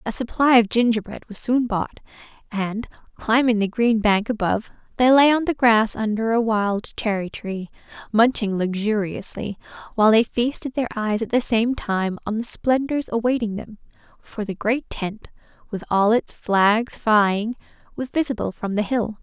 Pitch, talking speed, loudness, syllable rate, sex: 220 Hz, 165 wpm, -21 LUFS, 4.6 syllables/s, female